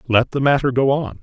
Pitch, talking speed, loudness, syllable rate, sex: 130 Hz, 245 wpm, -17 LUFS, 5.6 syllables/s, male